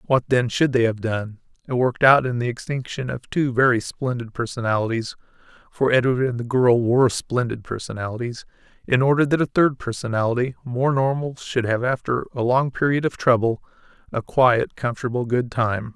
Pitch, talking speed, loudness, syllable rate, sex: 125 Hz, 165 wpm, -21 LUFS, 5.3 syllables/s, male